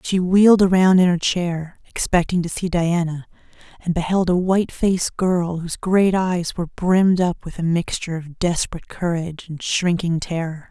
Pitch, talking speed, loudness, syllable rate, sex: 175 Hz, 175 wpm, -20 LUFS, 5.1 syllables/s, female